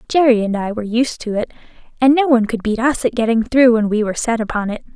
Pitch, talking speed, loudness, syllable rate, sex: 230 Hz, 265 wpm, -16 LUFS, 6.6 syllables/s, female